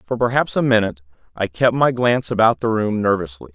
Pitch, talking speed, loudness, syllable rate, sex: 110 Hz, 205 wpm, -18 LUFS, 6.2 syllables/s, male